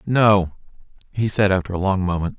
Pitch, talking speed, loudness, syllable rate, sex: 95 Hz, 175 wpm, -19 LUFS, 5.2 syllables/s, male